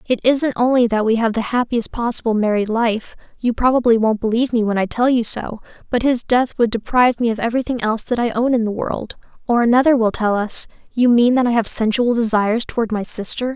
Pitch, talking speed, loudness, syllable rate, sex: 230 Hz, 225 wpm, -18 LUFS, 6.0 syllables/s, female